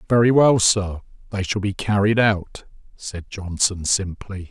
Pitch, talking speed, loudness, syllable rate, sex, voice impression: 100 Hz, 145 wpm, -19 LUFS, 4.1 syllables/s, male, masculine, middle-aged, slightly powerful, halting, raspy, sincere, calm, mature, wild, slightly strict, slightly modest